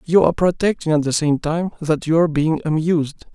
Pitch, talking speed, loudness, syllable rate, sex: 160 Hz, 215 wpm, -19 LUFS, 5.9 syllables/s, male